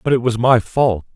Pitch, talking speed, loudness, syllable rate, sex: 120 Hz, 260 wpm, -16 LUFS, 5.1 syllables/s, male